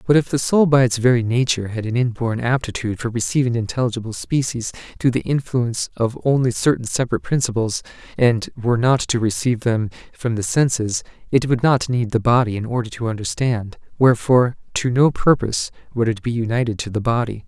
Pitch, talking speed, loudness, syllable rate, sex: 120 Hz, 185 wpm, -19 LUFS, 6.0 syllables/s, male